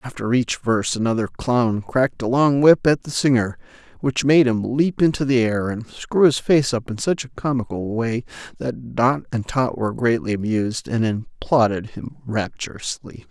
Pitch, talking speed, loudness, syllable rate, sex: 120 Hz, 180 wpm, -20 LUFS, 4.8 syllables/s, male